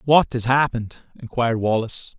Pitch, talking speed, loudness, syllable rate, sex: 120 Hz, 135 wpm, -21 LUFS, 5.8 syllables/s, male